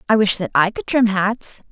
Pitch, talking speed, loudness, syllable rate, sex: 200 Hz, 245 wpm, -18 LUFS, 4.8 syllables/s, female